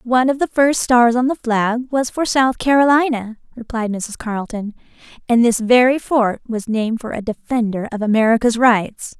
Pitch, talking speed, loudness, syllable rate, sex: 235 Hz, 175 wpm, -17 LUFS, 5.0 syllables/s, female